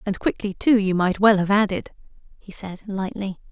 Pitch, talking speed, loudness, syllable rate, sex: 195 Hz, 190 wpm, -21 LUFS, 5.2 syllables/s, female